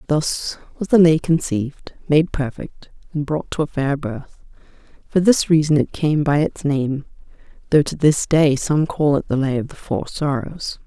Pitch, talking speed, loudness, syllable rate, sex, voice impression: 150 Hz, 190 wpm, -19 LUFS, 4.5 syllables/s, female, very feminine, adult-like, slightly middle-aged, thin, slightly relaxed, slightly weak, slightly dark, soft, slightly muffled, fluent, slightly raspy, slightly cute, intellectual, slightly refreshing, sincere, very calm, friendly, reassuring, slightly unique, elegant, slightly sweet, slightly lively, kind, slightly modest